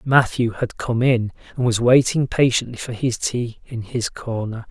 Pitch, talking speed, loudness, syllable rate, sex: 120 Hz, 180 wpm, -20 LUFS, 4.4 syllables/s, male